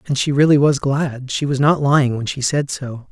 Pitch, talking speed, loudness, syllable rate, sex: 140 Hz, 250 wpm, -17 LUFS, 5.1 syllables/s, male